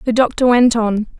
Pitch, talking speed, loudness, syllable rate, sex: 235 Hz, 200 wpm, -14 LUFS, 5.1 syllables/s, female